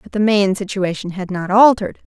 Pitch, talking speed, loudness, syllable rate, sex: 200 Hz, 200 wpm, -16 LUFS, 5.5 syllables/s, female